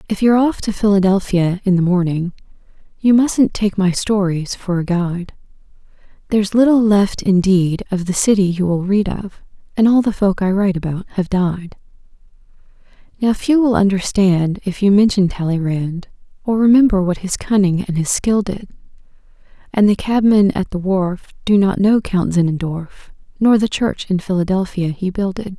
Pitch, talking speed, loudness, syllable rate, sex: 195 Hz, 165 wpm, -16 LUFS, 5.0 syllables/s, female